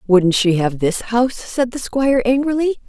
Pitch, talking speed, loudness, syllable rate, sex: 235 Hz, 190 wpm, -17 LUFS, 5.0 syllables/s, female